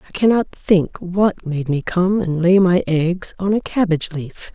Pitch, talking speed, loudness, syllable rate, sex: 180 Hz, 200 wpm, -18 LUFS, 4.2 syllables/s, female